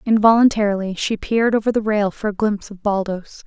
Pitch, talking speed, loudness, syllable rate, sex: 210 Hz, 190 wpm, -18 LUFS, 6.0 syllables/s, female